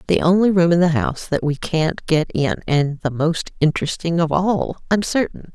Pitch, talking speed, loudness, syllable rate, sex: 165 Hz, 205 wpm, -19 LUFS, 4.9 syllables/s, female